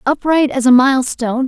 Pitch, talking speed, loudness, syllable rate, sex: 265 Hz, 165 wpm, -13 LUFS, 5.7 syllables/s, female